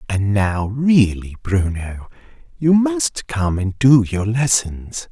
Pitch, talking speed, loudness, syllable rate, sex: 115 Hz, 130 wpm, -18 LUFS, 3.2 syllables/s, male